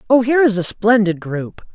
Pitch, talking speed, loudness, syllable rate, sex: 215 Hz, 205 wpm, -16 LUFS, 5.3 syllables/s, female